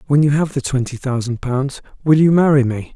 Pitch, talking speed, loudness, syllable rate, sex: 135 Hz, 225 wpm, -17 LUFS, 5.5 syllables/s, male